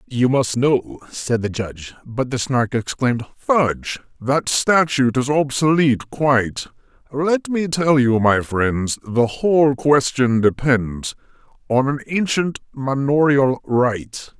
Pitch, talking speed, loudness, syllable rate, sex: 130 Hz, 130 wpm, -19 LUFS, 3.8 syllables/s, male